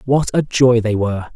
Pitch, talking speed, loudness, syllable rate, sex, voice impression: 120 Hz, 220 wpm, -16 LUFS, 5.3 syllables/s, male, masculine, adult-like, tensed, powerful, soft, slightly muffled, slightly raspy, calm, slightly mature, friendly, reassuring, slightly wild, kind, modest